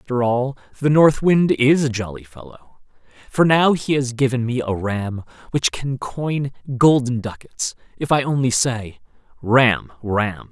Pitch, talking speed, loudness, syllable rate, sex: 125 Hz, 160 wpm, -19 LUFS, 4.2 syllables/s, male